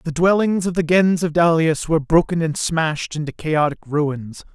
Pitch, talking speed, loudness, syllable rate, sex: 160 Hz, 185 wpm, -19 LUFS, 4.9 syllables/s, male